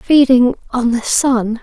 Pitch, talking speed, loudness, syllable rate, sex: 245 Hz, 150 wpm, -14 LUFS, 3.4 syllables/s, female